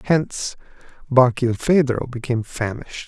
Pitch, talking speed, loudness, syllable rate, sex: 125 Hz, 80 wpm, -20 LUFS, 5.0 syllables/s, male